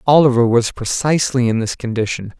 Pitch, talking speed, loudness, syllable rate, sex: 125 Hz, 150 wpm, -16 LUFS, 5.8 syllables/s, male